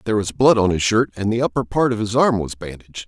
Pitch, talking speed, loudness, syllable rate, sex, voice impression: 110 Hz, 295 wpm, -18 LUFS, 6.6 syllables/s, male, masculine, adult-like, slightly thick, tensed, powerful, bright, clear, fluent, intellectual, slightly friendly, unique, wild, lively, intense, slightly light